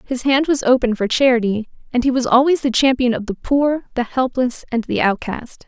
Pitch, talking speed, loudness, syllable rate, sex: 250 Hz, 210 wpm, -18 LUFS, 5.2 syllables/s, female